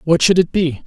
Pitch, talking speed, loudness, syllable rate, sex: 170 Hz, 275 wpm, -15 LUFS, 5.3 syllables/s, male